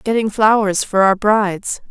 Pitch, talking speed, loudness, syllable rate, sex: 205 Hz, 155 wpm, -15 LUFS, 4.4 syllables/s, female